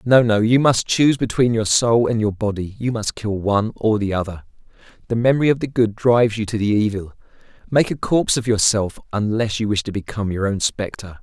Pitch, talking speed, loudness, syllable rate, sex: 110 Hz, 220 wpm, -19 LUFS, 5.8 syllables/s, male